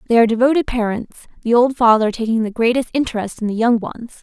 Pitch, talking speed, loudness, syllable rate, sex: 230 Hz, 215 wpm, -17 LUFS, 6.5 syllables/s, female